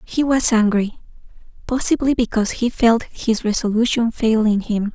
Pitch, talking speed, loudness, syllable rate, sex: 230 Hz, 135 wpm, -18 LUFS, 4.8 syllables/s, female